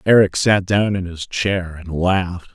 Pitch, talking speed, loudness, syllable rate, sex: 95 Hz, 190 wpm, -18 LUFS, 4.2 syllables/s, male